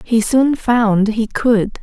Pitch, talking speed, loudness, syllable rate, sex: 225 Hz, 165 wpm, -15 LUFS, 3.1 syllables/s, female